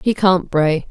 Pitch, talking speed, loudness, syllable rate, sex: 175 Hz, 200 wpm, -16 LUFS, 3.8 syllables/s, female